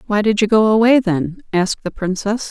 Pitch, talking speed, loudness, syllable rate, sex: 205 Hz, 215 wpm, -16 LUFS, 5.3 syllables/s, female